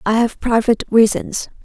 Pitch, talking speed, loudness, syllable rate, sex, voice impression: 225 Hz, 145 wpm, -16 LUFS, 5.2 syllables/s, female, feminine, slightly adult-like, slightly cute, sincere, slightly calm, slightly kind